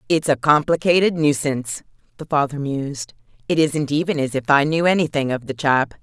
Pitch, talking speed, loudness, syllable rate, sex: 145 Hz, 180 wpm, -19 LUFS, 5.5 syllables/s, female